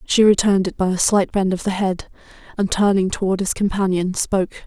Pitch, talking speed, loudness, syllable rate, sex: 190 Hz, 205 wpm, -19 LUFS, 5.6 syllables/s, female